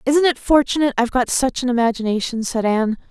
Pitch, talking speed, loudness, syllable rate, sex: 250 Hz, 195 wpm, -18 LUFS, 6.7 syllables/s, female